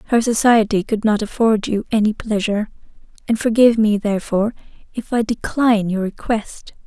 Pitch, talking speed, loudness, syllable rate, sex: 215 Hz, 150 wpm, -18 LUFS, 5.5 syllables/s, female